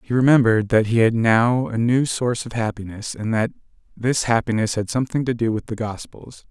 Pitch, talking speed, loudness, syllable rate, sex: 115 Hz, 205 wpm, -20 LUFS, 5.6 syllables/s, male